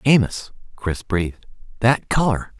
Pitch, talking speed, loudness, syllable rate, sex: 110 Hz, 115 wpm, -21 LUFS, 4.2 syllables/s, male